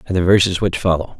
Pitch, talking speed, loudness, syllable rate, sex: 90 Hz, 250 wpm, -16 LUFS, 6.5 syllables/s, male